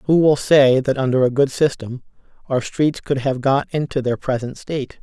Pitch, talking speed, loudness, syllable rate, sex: 135 Hz, 205 wpm, -18 LUFS, 4.8 syllables/s, male